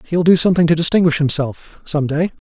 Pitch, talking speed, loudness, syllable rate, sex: 160 Hz, 195 wpm, -16 LUFS, 5.9 syllables/s, male